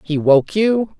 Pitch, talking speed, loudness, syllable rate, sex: 180 Hz, 180 wpm, -15 LUFS, 3.4 syllables/s, female